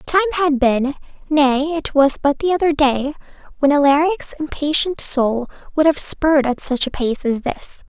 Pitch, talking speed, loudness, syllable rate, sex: 290 Hz, 160 wpm, -17 LUFS, 4.7 syllables/s, female